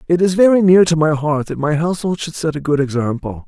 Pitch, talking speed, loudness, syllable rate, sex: 160 Hz, 260 wpm, -16 LUFS, 6.1 syllables/s, male